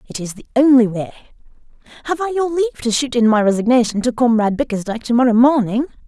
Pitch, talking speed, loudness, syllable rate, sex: 245 Hz, 190 wpm, -16 LUFS, 6.5 syllables/s, female